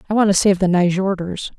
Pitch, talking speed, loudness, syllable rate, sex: 190 Hz, 225 wpm, -17 LUFS, 6.1 syllables/s, female